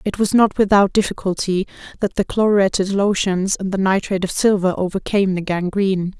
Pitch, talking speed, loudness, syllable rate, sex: 195 Hz, 165 wpm, -18 LUFS, 5.8 syllables/s, female